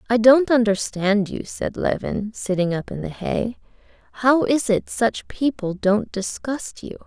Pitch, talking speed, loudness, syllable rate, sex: 225 Hz, 160 wpm, -21 LUFS, 4.0 syllables/s, female